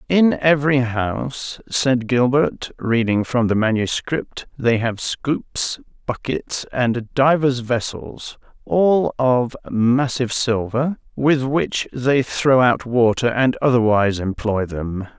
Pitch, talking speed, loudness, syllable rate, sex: 125 Hz, 120 wpm, -19 LUFS, 3.5 syllables/s, male